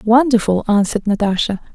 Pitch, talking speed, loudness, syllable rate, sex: 220 Hz, 105 wpm, -16 LUFS, 5.9 syllables/s, female